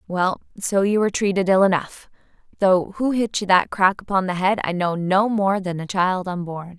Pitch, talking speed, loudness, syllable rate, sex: 190 Hz, 205 wpm, -20 LUFS, 4.9 syllables/s, female